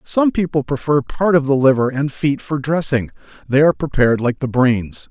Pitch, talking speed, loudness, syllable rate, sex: 140 Hz, 190 wpm, -17 LUFS, 5.2 syllables/s, male